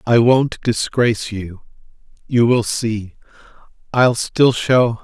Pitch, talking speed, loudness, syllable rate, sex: 115 Hz, 120 wpm, -17 LUFS, 3.4 syllables/s, male